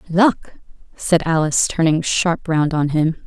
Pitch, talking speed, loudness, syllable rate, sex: 165 Hz, 145 wpm, -17 LUFS, 4.2 syllables/s, female